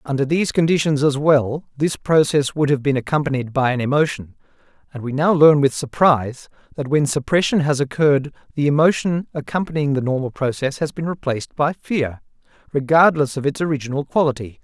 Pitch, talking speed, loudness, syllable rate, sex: 145 Hz, 170 wpm, -19 LUFS, 5.7 syllables/s, male